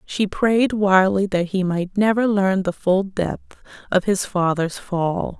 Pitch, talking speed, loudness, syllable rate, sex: 190 Hz, 165 wpm, -20 LUFS, 3.7 syllables/s, female